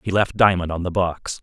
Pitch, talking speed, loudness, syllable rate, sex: 90 Hz, 255 wpm, -20 LUFS, 5.3 syllables/s, male